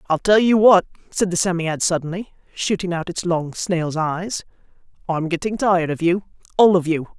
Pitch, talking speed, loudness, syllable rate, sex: 175 Hz, 185 wpm, -19 LUFS, 4.9 syllables/s, female